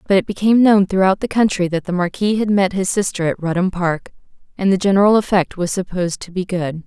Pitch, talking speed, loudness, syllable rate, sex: 190 Hz, 225 wpm, -17 LUFS, 6.1 syllables/s, female